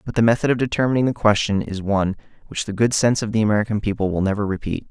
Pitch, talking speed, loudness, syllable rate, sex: 110 Hz, 245 wpm, -20 LUFS, 7.4 syllables/s, male